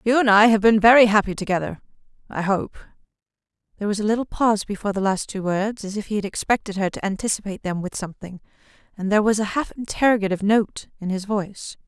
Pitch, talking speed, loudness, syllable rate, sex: 205 Hz, 200 wpm, -21 LUFS, 6.8 syllables/s, female